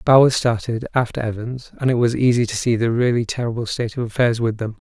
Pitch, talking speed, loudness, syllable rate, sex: 120 Hz, 220 wpm, -20 LUFS, 6.1 syllables/s, male